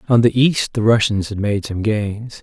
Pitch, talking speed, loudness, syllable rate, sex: 110 Hz, 225 wpm, -17 LUFS, 4.4 syllables/s, male